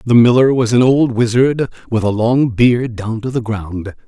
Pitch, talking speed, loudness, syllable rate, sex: 120 Hz, 205 wpm, -14 LUFS, 4.4 syllables/s, male